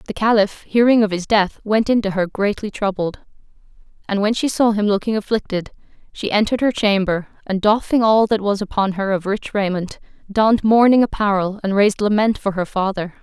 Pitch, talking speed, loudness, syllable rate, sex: 205 Hz, 190 wpm, -18 LUFS, 5.5 syllables/s, female